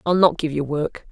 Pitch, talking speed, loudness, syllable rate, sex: 155 Hz, 270 wpm, -21 LUFS, 5.2 syllables/s, female